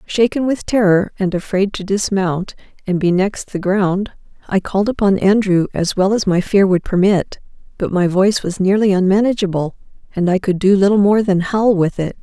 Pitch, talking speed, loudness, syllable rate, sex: 195 Hz, 190 wpm, -16 LUFS, 5.1 syllables/s, female